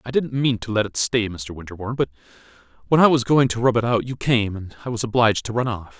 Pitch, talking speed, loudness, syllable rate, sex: 115 Hz, 270 wpm, -21 LUFS, 6.4 syllables/s, male